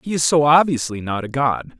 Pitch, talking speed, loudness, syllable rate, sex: 135 Hz, 235 wpm, -18 LUFS, 5.4 syllables/s, male